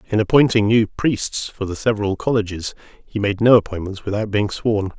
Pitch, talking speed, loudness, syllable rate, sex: 105 Hz, 180 wpm, -19 LUFS, 5.3 syllables/s, male